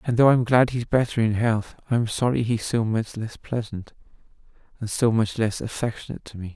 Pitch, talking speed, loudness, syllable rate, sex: 115 Hz, 200 wpm, -23 LUFS, 5.3 syllables/s, male